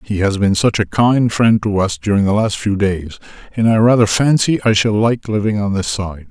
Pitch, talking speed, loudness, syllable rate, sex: 105 Hz, 230 wpm, -15 LUFS, 4.9 syllables/s, male